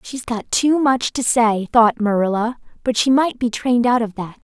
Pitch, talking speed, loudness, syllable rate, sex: 235 Hz, 215 wpm, -18 LUFS, 4.7 syllables/s, female